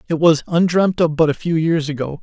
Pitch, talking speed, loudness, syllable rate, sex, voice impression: 160 Hz, 240 wpm, -17 LUFS, 5.5 syllables/s, male, very masculine, very adult-like, slightly old, thick, slightly tensed, slightly weak, slightly bright, hard, clear, fluent, slightly raspy, slightly cool, very intellectual, slightly refreshing, sincere, calm, mature, friendly, reassuring, unique, elegant, slightly wild, sweet, slightly lively, kind, slightly modest